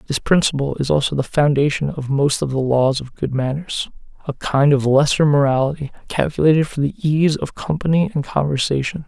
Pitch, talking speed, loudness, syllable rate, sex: 145 Hz, 180 wpm, -18 LUFS, 5.5 syllables/s, male